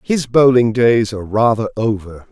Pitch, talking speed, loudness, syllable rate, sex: 115 Hz, 155 wpm, -15 LUFS, 4.7 syllables/s, male